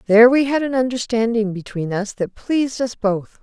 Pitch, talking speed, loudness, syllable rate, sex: 230 Hz, 190 wpm, -19 LUFS, 5.2 syllables/s, female